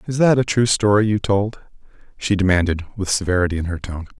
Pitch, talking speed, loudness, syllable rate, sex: 100 Hz, 200 wpm, -19 LUFS, 6.1 syllables/s, male